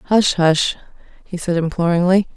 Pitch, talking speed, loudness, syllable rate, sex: 175 Hz, 100 wpm, -17 LUFS, 4.9 syllables/s, female